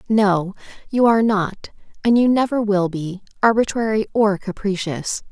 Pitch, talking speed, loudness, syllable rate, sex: 205 Hz, 135 wpm, -19 LUFS, 4.6 syllables/s, female